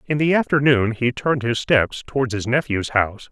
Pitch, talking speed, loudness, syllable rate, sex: 125 Hz, 200 wpm, -19 LUFS, 5.4 syllables/s, male